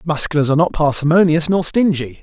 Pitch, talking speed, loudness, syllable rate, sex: 160 Hz, 160 wpm, -15 LUFS, 6.2 syllables/s, male